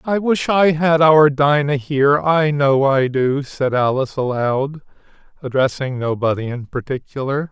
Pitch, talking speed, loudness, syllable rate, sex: 140 Hz, 145 wpm, -17 LUFS, 4.4 syllables/s, male